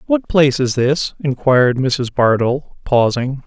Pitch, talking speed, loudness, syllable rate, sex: 130 Hz, 140 wpm, -16 LUFS, 4.2 syllables/s, male